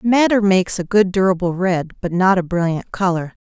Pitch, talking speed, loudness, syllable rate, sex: 185 Hz, 190 wpm, -17 LUFS, 5.3 syllables/s, female